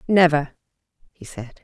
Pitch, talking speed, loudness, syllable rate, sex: 150 Hz, 110 wpm, -18 LUFS, 4.3 syllables/s, female